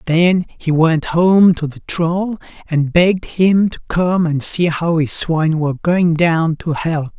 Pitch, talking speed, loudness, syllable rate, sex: 165 Hz, 185 wpm, -15 LUFS, 3.8 syllables/s, male